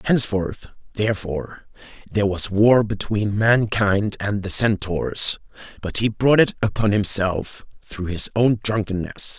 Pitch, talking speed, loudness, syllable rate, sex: 105 Hz, 130 wpm, -20 LUFS, 4.3 syllables/s, male